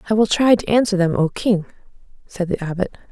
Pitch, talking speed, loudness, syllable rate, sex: 195 Hz, 210 wpm, -18 LUFS, 5.9 syllables/s, female